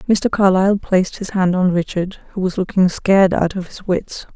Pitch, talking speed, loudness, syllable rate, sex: 190 Hz, 205 wpm, -17 LUFS, 5.3 syllables/s, female